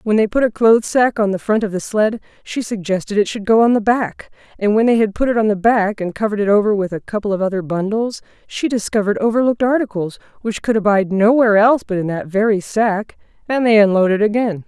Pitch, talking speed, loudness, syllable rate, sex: 210 Hz, 235 wpm, -16 LUFS, 6.3 syllables/s, female